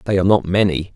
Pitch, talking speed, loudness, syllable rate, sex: 95 Hz, 250 wpm, -17 LUFS, 7.4 syllables/s, male